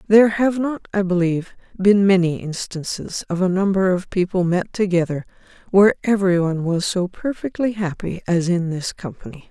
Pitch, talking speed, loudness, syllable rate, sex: 185 Hz, 165 wpm, -20 LUFS, 5.3 syllables/s, female